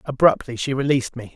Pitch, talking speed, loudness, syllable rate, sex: 130 Hz, 175 wpm, -20 LUFS, 6.5 syllables/s, male